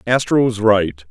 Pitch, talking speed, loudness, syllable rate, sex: 110 Hz, 160 wpm, -16 LUFS, 4.1 syllables/s, male